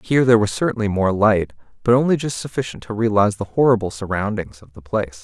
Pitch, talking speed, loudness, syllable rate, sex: 105 Hz, 205 wpm, -19 LUFS, 6.7 syllables/s, male